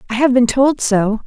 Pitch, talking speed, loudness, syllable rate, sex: 245 Hz, 235 wpm, -14 LUFS, 4.7 syllables/s, female